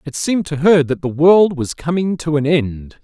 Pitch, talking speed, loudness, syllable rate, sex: 155 Hz, 235 wpm, -15 LUFS, 4.8 syllables/s, male